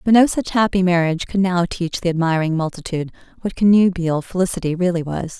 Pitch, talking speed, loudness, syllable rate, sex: 175 Hz, 180 wpm, -19 LUFS, 6.0 syllables/s, female